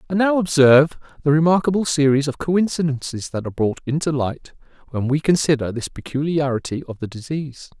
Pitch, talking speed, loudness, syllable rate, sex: 145 Hz, 160 wpm, -20 LUFS, 5.9 syllables/s, male